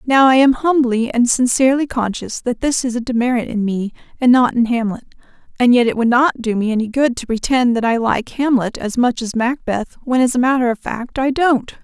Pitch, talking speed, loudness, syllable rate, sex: 245 Hz, 230 wpm, -16 LUFS, 5.4 syllables/s, female